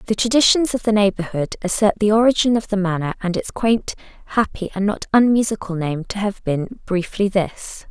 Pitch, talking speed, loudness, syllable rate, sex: 205 Hz, 175 wpm, -19 LUFS, 5.2 syllables/s, female